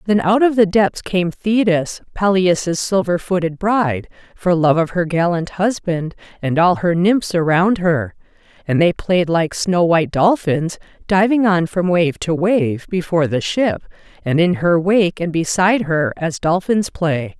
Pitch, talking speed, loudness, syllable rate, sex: 175 Hz, 170 wpm, -17 LUFS, 4.2 syllables/s, female